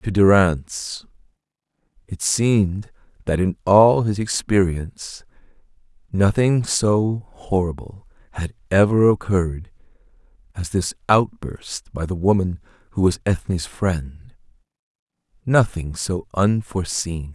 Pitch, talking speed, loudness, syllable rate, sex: 95 Hz, 95 wpm, -20 LUFS, 3.9 syllables/s, male